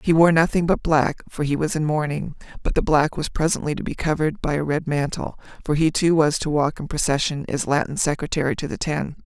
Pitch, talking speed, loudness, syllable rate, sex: 155 Hz, 235 wpm, -22 LUFS, 5.8 syllables/s, female